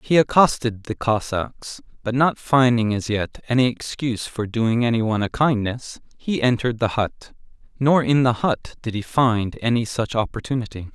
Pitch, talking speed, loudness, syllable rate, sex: 120 Hz, 165 wpm, -21 LUFS, 4.8 syllables/s, male